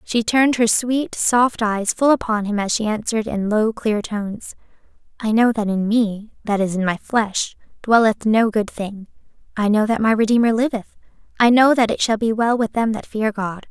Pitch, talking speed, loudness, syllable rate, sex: 220 Hz, 210 wpm, -19 LUFS, 4.7 syllables/s, female